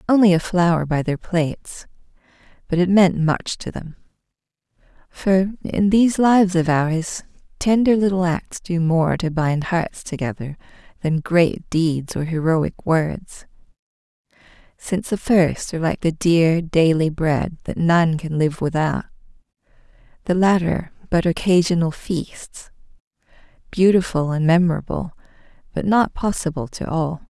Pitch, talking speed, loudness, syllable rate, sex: 170 Hz, 130 wpm, -19 LUFS, 4.3 syllables/s, female